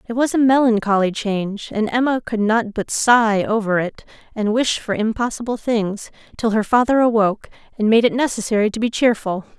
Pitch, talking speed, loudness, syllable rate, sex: 225 Hz, 180 wpm, -18 LUFS, 5.3 syllables/s, female